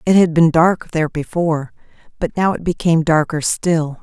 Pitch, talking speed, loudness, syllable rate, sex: 165 Hz, 180 wpm, -16 LUFS, 5.2 syllables/s, female